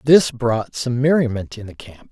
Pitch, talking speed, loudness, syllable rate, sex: 125 Hz, 200 wpm, -18 LUFS, 4.6 syllables/s, male